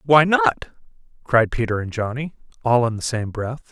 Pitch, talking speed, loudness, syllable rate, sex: 120 Hz, 180 wpm, -20 LUFS, 4.6 syllables/s, male